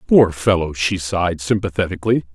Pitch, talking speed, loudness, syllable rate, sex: 90 Hz, 130 wpm, -18 LUFS, 5.7 syllables/s, male